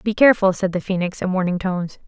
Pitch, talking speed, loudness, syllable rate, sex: 190 Hz, 230 wpm, -19 LUFS, 6.6 syllables/s, female